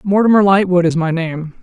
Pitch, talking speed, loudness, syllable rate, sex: 180 Hz, 185 wpm, -14 LUFS, 5.4 syllables/s, female